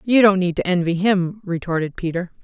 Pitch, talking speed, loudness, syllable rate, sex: 185 Hz, 195 wpm, -19 LUFS, 5.4 syllables/s, female